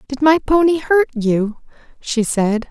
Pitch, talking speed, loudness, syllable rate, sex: 265 Hz, 155 wpm, -16 LUFS, 3.7 syllables/s, female